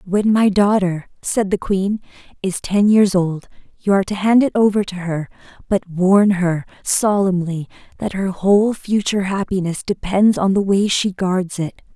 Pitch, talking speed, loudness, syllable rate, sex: 195 Hz, 170 wpm, -18 LUFS, 4.5 syllables/s, female